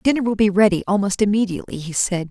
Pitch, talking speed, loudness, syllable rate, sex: 200 Hz, 210 wpm, -19 LUFS, 6.7 syllables/s, female